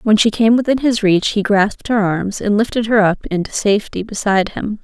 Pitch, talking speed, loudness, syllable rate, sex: 210 Hz, 225 wpm, -16 LUFS, 5.5 syllables/s, female